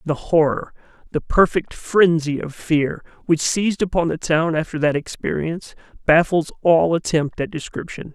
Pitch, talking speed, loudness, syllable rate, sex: 160 Hz, 145 wpm, -20 LUFS, 4.7 syllables/s, male